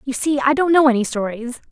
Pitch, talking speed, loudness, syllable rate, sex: 260 Hz, 245 wpm, -17 LUFS, 6.3 syllables/s, female